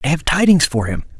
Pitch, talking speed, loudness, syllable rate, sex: 145 Hz, 250 wpm, -15 LUFS, 6.1 syllables/s, male